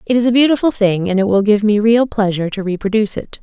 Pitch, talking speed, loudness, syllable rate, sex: 215 Hz, 265 wpm, -15 LUFS, 6.7 syllables/s, female